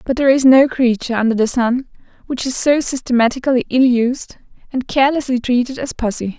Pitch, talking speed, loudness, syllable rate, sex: 250 Hz, 180 wpm, -16 LUFS, 5.9 syllables/s, female